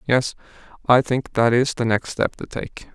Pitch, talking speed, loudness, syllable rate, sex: 120 Hz, 205 wpm, -21 LUFS, 4.4 syllables/s, male